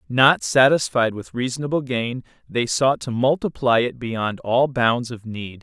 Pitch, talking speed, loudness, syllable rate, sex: 125 Hz, 160 wpm, -20 LUFS, 4.2 syllables/s, male